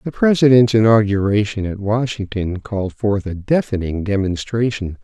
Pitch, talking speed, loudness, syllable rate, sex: 105 Hz, 120 wpm, -17 LUFS, 4.9 syllables/s, male